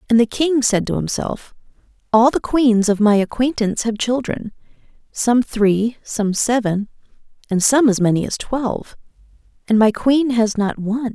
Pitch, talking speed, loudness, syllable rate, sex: 230 Hz, 160 wpm, -18 LUFS, 4.6 syllables/s, female